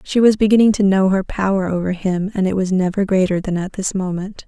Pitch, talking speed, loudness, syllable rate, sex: 190 Hz, 240 wpm, -17 LUFS, 5.8 syllables/s, female